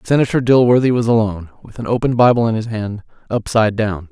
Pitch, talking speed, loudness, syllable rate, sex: 115 Hz, 175 wpm, -16 LUFS, 6.3 syllables/s, male